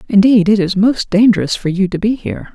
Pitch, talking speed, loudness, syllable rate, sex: 200 Hz, 235 wpm, -13 LUFS, 6.0 syllables/s, female